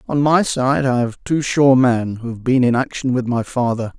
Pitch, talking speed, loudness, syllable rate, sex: 125 Hz, 240 wpm, -17 LUFS, 4.8 syllables/s, male